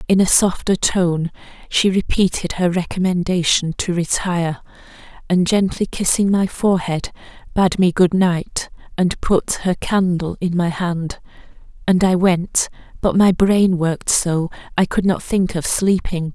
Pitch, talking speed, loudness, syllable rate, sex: 180 Hz, 145 wpm, -18 LUFS, 4.2 syllables/s, female